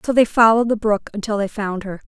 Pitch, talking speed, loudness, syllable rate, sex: 215 Hz, 255 wpm, -18 LUFS, 6.3 syllables/s, female